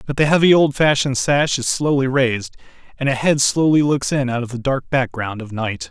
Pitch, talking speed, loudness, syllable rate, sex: 135 Hz, 215 wpm, -18 LUFS, 5.4 syllables/s, male